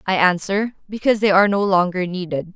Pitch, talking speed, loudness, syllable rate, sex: 190 Hz, 190 wpm, -18 LUFS, 6.1 syllables/s, female